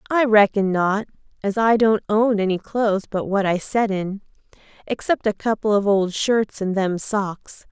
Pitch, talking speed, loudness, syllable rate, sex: 205 Hz, 180 wpm, -20 LUFS, 4.4 syllables/s, female